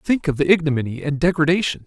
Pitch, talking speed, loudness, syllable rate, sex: 155 Hz, 195 wpm, -19 LUFS, 6.6 syllables/s, male